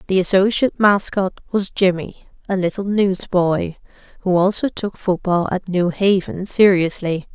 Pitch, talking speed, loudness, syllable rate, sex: 190 Hz, 130 wpm, -18 LUFS, 4.4 syllables/s, female